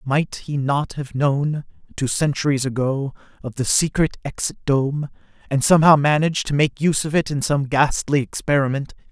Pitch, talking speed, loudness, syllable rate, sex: 140 Hz, 165 wpm, -20 LUFS, 5.0 syllables/s, male